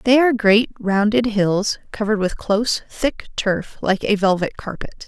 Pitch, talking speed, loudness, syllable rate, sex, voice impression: 210 Hz, 165 wpm, -19 LUFS, 4.5 syllables/s, female, very feminine, adult-like, slightly middle-aged, thin, slightly tensed, powerful, bright, hard, clear, fluent, raspy, slightly cool, intellectual, very refreshing, slightly sincere, slightly calm, slightly friendly, slightly reassuring, unique, slightly elegant, wild, slightly sweet, lively, strict, slightly intense, sharp, slightly light